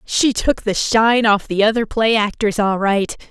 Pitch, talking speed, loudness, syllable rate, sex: 215 Hz, 200 wpm, -16 LUFS, 4.4 syllables/s, female